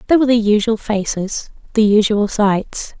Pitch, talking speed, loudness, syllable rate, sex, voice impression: 215 Hz, 160 wpm, -16 LUFS, 5.1 syllables/s, female, feminine, slightly adult-like, slightly clear, slightly refreshing, friendly, reassuring